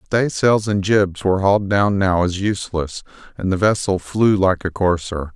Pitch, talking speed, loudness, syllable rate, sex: 95 Hz, 190 wpm, -18 LUFS, 5.1 syllables/s, male